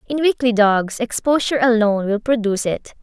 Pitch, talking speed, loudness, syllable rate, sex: 230 Hz, 160 wpm, -18 LUFS, 5.6 syllables/s, female